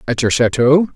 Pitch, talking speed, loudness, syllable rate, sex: 130 Hz, 190 wpm, -14 LUFS, 5.1 syllables/s, male